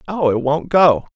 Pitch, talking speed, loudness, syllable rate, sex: 155 Hz, 205 wpm, -16 LUFS, 4.4 syllables/s, male